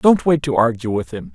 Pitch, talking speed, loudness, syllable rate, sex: 125 Hz, 270 wpm, -18 LUFS, 5.3 syllables/s, male